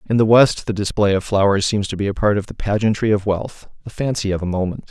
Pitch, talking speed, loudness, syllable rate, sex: 105 Hz, 255 wpm, -18 LUFS, 6.1 syllables/s, male